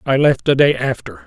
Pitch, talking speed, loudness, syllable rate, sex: 135 Hz, 235 wpm, -15 LUFS, 5.4 syllables/s, male